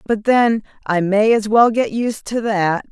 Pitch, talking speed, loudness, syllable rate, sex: 215 Hz, 205 wpm, -17 LUFS, 4.0 syllables/s, female